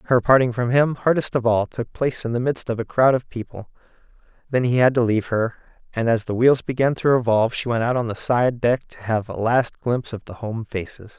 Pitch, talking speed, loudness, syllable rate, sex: 120 Hz, 245 wpm, -21 LUFS, 5.7 syllables/s, male